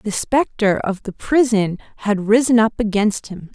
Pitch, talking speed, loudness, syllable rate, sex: 215 Hz, 170 wpm, -18 LUFS, 4.4 syllables/s, female